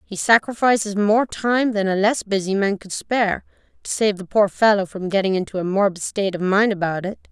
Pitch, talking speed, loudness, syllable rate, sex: 200 Hz, 215 wpm, -20 LUFS, 5.4 syllables/s, female